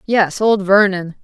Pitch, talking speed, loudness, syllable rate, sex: 195 Hz, 145 wpm, -14 LUFS, 3.7 syllables/s, female